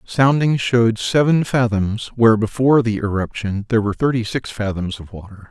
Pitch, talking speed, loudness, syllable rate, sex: 115 Hz, 165 wpm, -18 LUFS, 5.5 syllables/s, male